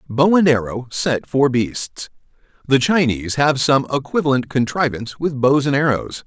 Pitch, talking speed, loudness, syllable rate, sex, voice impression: 135 Hz, 145 wpm, -18 LUFS, 4.8 syllables/s, male, masculine, very adult-like, slightly thick, slightly intellectual, slightly refreshing